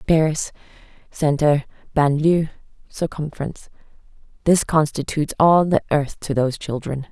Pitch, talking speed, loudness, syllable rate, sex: 150 Hz, 100 wpm, -20 LUFS, 5.0 syllables/s, female